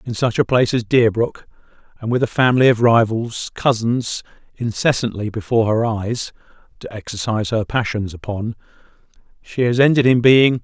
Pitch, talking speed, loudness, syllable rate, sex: 115 Hz, 150 wpm, -18 LUFS, 5.3 syllables/s, male